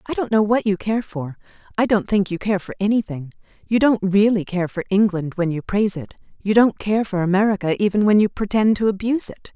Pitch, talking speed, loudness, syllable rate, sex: 200 Hz, 225 wpm, -19 LUFS, 5.8 syllables/s, female